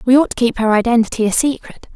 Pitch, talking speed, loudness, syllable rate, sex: 235 Hz, 245 wpm, -15 LUFS, 6.6 syllables/s, female